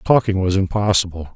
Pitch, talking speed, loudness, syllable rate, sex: 95 Hz, 135 wpm, -18 LUFS, 5.7 syllables/s, male